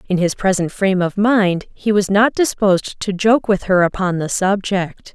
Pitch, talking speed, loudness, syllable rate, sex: 195 Hz, 200 wpm, -17 LUFS, 4.7 syllables/s, female